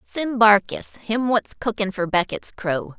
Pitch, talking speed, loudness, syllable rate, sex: 210 Hz, 160 wpm, -21 LUFS, 3.9 syllables/s, female